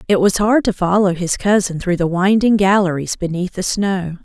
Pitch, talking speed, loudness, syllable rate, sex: 190 Hz, 200 wpm, -16 LUFS, 5.0 syllables/s, female